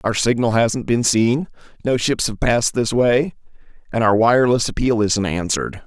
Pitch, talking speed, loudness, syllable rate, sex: 115 Hz, 175 wpm, -18 LUFS, 5.0 syllables/s, male